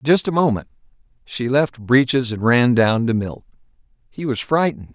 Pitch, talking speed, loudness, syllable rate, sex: 125 Hz, 160 wpm, -18 LUFS, 4.8 syllables/s, male